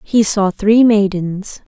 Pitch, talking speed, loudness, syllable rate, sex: 205 Hz, 140 wpm, -14 LUFS, 3.2 syllables/s, female